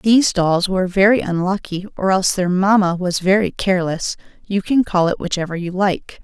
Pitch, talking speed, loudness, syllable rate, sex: 190 Hz, 185 wpm, -18 LUFS, 5.4 syllables/s, female